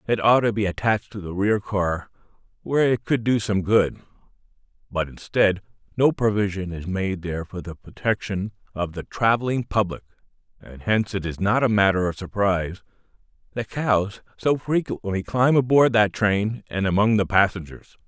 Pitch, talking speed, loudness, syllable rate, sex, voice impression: 100 Hz, 165 wpm, -23 LUFS, 5.0 syllables/s, male, very masculine, old, thick, slightly powerful, very calm, slightly mature, wild